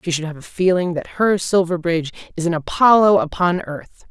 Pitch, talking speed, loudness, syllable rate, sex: 175 Hz, 190 wpm, -18 LUFS, 5.4 syllables/s, female